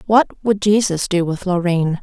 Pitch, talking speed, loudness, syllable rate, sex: 190 Hz, 180 wpm, -17 LUFS, 4.5 syllables/s, female